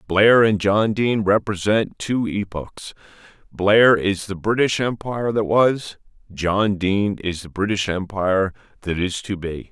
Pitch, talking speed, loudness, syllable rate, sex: 100 Hz, 150 wpm, -20 LUFS, 4.2 syllables/s, male